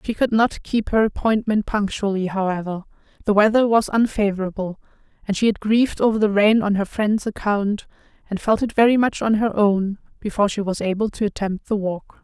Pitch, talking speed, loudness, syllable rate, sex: 210 Hz, 190 wpm, -20 LUFS, 5.5 syllables/s, female